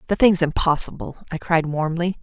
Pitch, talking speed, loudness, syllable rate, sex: 165 Hz, 160 wpm, -20 LUFS, 5.1 syllables/s, female